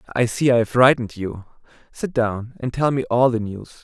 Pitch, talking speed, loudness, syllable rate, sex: 120 Hz, 205 wpm, -20 LUFS, 5.6 syllables/s, male